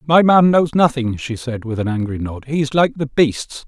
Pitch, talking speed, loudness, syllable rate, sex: 135 Hz, 245 wpm, -17 LUFS, 4.8 syllables/s, male